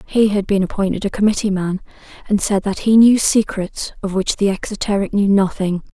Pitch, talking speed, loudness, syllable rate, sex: 200 Hz, 190 wpm, -17 LUFS, 5.4 syllables/s, female